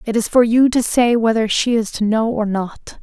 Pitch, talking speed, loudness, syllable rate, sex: 225 Hz, 260 wpm, -16 LUFS, 4.8 syllables/s, female